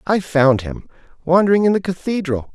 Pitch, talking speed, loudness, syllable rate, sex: 170 Hz, 165 wpm, -17 LUFS, 5.4 syllables/s, male